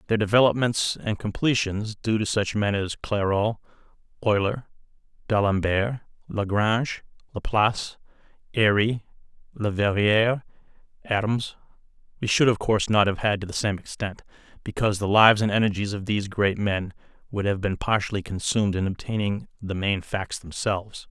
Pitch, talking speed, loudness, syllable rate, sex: 105 Hz, 135 wpm, -24 LUFS, 5.1 syllables/s, male